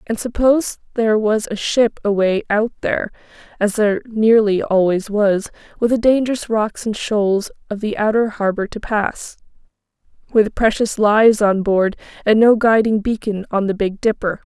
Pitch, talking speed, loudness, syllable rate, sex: 215 Hz, 160 wpm, -17 LUFS, 4.8 syllables/s, female